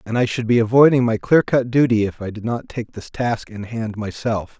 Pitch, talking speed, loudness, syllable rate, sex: 115 Hz, 250 wpm, -19 LUFS, 5.2 syllables/s, male